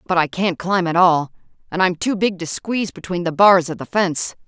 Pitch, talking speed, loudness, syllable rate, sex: 175 Hz, 240 wpm, -18 LUFS, 5.5 syllables/s, female